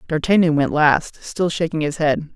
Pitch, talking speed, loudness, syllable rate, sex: 155 Hz, 180 wpm, -18 LUFS, 4.8 syllables/s, male